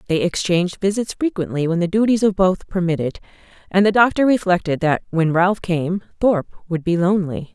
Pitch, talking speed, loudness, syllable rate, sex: 185 Hz, 175 wpm, -19 LUFS, 5.7 syllables/s, female